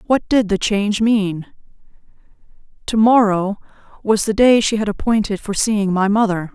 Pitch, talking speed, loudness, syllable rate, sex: 210 Hz, 155 wpm, -17 LUFS, 4.7 syllables/s, female